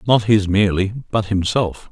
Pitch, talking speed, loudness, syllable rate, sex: 105 Hz, 155 wpm, -18 LUFS, 5.1 syllables/s, male